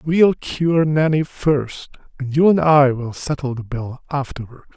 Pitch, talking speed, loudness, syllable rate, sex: 145 Hz, 165 wpm, -18 LUFS, 4.0 syllables/s, male